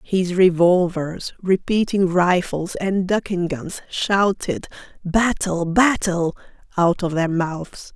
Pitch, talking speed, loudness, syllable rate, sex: 180 Hz, 105 wpm, -20 LUFS, 3.3 syllables/s, female